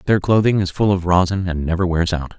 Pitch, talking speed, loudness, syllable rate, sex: 90 Hz, 250 wpm, -18 LUFS, 5.8 syllables/s, male